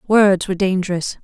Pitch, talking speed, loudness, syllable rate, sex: 190 Hz, 145 wpm, -17 LUFS, 5.2 syllables/s, female